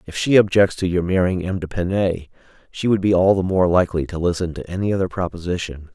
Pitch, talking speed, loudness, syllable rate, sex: 90 Hz, 210 wpm, -19 LUFS, 6.1 syllables/s, male